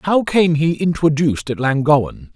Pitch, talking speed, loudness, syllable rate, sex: 150 Hz, 155 wpm, -16 LUFS, 4.8 syllables/s, male